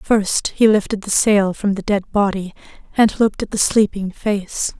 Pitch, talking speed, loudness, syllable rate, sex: 205 Hz, 190 wpm, -18 LUFS, 4.4 syllables/s, female